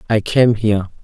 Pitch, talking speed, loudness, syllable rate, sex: 110 Hz, 175 wpm, -15 LUFS, 5.3 syllables/s, male